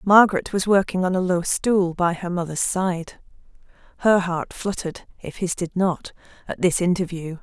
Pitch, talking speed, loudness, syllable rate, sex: 180 Hz, 170 wpm, -22 LUFS, 4.8 syllables/s, female